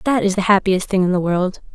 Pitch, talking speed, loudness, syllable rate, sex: 195 Hz, 275 wpm, -17 LUFS, 5.9 syllables/s, female